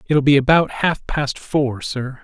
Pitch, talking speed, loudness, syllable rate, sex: 140 Hz, 190 wpm, -18 LUFS, 4.0 syllables/s, male